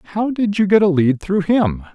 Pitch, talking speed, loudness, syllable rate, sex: 180 Hz, 245 wpm, -16 LUFS, 5.1 syllables/s, male